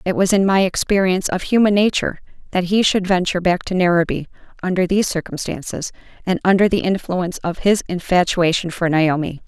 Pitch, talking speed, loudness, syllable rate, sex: 180 Hz, 170 wpm, -18 LUFS, 6.0 syllables/s, female